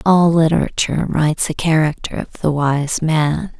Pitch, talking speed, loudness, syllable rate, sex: 155 Hz, 150 wpm, -17 LUFS, 4.6 syllables/s, female